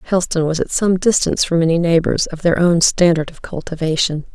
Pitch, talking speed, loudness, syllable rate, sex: 170 Hz, 195 wpm, -16 LUFS, 5.8 syllables/s, female